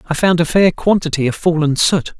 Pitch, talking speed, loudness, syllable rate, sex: 165 Hz, 220 wpm, -15 LUFS, 5.4 syllables/s, male